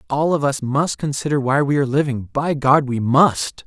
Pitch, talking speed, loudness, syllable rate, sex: 140 Hz, 215 wpm, -18 LUFS, 4.9 syllables/s, male